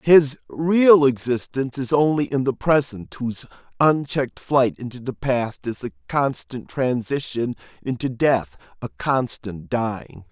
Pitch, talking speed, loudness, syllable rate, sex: 130 Hz, 135 wpm, -21 LUFS, 4.2 syllables/s, male